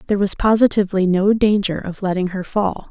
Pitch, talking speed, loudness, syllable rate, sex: 195 Hz, 185 wpm, -18 LUFS, 5.9 syllables/s, female